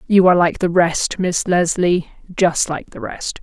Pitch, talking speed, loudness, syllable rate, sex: 175 Hz, 195 wpm, -17 LUFS, 4.3 syllables/s, female